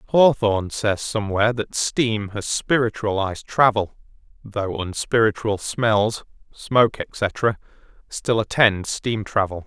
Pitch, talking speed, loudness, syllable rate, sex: 110 Hz, 105 wpm, -21 LUFS, 3.9 syllables/s, male